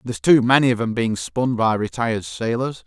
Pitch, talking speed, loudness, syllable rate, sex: 120 Hz, 210 wpm, -19 LUFS, 5.4 syllables/s, male